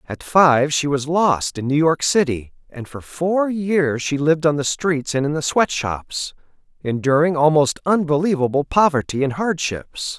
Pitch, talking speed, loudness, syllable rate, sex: 150 Hz, 170 wpm, -19 LUFS, 4.4 syllables/s, male